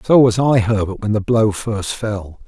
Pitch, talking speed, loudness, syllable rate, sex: 110 Hz, 220 wpm, -17 LUFS, 4.3 syllables/s, male